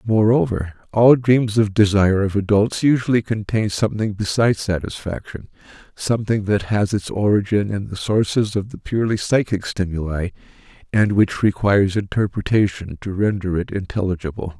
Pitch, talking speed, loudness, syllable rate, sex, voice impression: 100 Hz, 135 wpm, -19 LUFS, 5.2 syllables/s, male, very masculine, very adult-like, middle-aged, very thick, relaxed, weak, dark, soft, muffled, slightly halting, cool, very intellectual, sincere, calm, very mature, friendly, reassuring, unique, elegant, slightly sweet, kind, modest